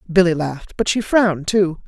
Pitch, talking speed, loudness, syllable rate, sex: 180 Hz, 190 wpm, -18 LUFS, 5.4 syllables/s, female